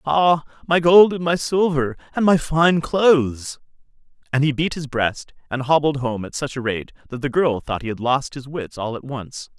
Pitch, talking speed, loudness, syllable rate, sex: 140 Hz, 215 wpm, -20 LUFS, 4.6 syllables/s, male